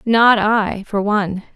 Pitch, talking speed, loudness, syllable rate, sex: 210 Hz, 155 wpm, -16 LUFS, 3.8 syllables/s, female